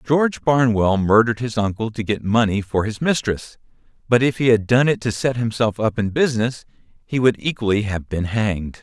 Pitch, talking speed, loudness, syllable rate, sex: 115 Hz, 195 wpm, -19 LUFS, 5.4 syllables/s, male